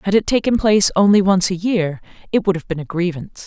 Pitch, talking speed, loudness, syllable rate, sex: 190 Hz, 240 wpm, -17 LUFS, 6.3 syllables/s, female